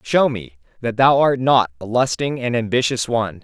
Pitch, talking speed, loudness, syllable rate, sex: 120 Hz, 190 wpm, -18 LUFS, 5.0 syllables/s, male